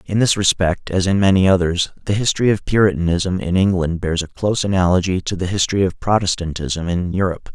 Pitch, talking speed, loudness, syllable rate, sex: 95 Hz, 190 wpm, -18 LUFS, 6.0 syllables/s, male